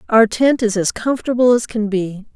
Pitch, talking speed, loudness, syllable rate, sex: 225 Hz, 205 wpm, -16 LUFS, 5.3 syllables/s, female